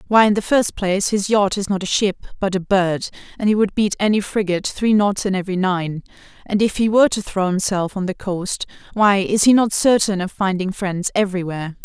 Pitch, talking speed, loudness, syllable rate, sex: 195 Hz, 225 wpm, -19 LUFS, 5.5 syllables/s, female